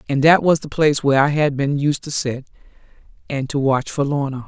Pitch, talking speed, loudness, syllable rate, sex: 140 Hz, 230 wpm, -18 LUFS, 5.8 syllables/s, female